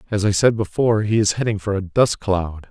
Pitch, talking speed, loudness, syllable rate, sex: 100 Hz, 245 wpm, -19 LUFS, 5.6 syllables/s, male